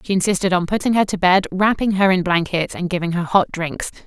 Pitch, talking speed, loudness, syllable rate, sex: 185 Hz, 235 wpm, -18 LUFS, 5.8 syllables/s, female